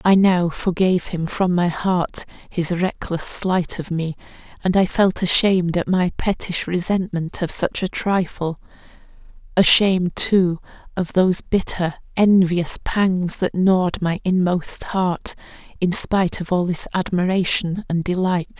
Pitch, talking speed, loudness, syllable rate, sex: 180 Hz, 140 wpm, -19 LUFS, 4.2 syllables/s, female